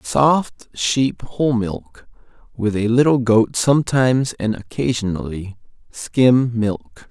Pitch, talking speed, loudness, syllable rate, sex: 115 Hz, 110 wpm, -18 LUFS, 3.6 syllables/s, male